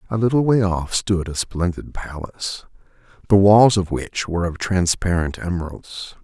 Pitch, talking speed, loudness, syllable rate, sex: 90 Hz, 155 wpm, -19 LUFS, 4.7 syllables/s, male